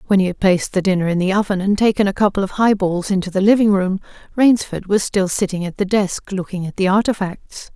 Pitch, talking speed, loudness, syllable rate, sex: 195 Hz, 230 wpm, -17 LUFS, 6.0 syllables/s, female